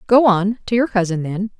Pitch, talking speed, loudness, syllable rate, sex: 205 Hz, 225 wpm, -18 LUFS, 5.2 syllables/s, female